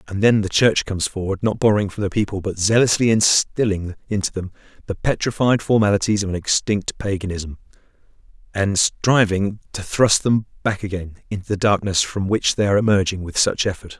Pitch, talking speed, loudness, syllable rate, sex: 100 Hz, 175 wpm, -19 LUFS, 5.6 syllables/s, male